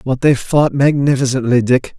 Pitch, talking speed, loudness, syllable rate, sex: 135 Hz, 150 wpm, -14 LUFS, 4.8 syllables/s, male